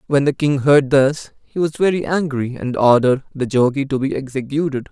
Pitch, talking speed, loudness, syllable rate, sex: 140 Hz, 195 wpm, -17 LUFS, 5.3 syllables/s, male